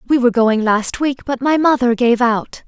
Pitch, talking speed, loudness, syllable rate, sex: 245 Hz, 225 wpm, -15 LUFS, 4.8 syllables/s, female